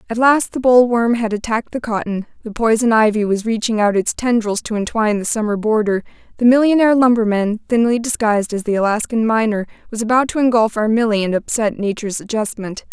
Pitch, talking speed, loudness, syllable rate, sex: 220 Hz, 175 wpm, -17 LUFS, 6.0 syllables/s, female